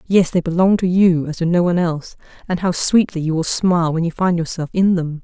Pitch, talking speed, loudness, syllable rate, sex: 170 Hz, 250 wpm, -17 LUFS, 5.9 syllables/s, female